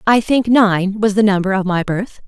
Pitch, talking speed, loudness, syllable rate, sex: 205 Hz, 235 wpm, -15 LUFS, 4.8 syllables/s, female